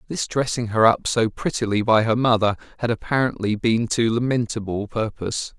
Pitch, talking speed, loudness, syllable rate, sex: 115 Hz, 160 wpm, -21 LUFS, 5.3 syllables/s, male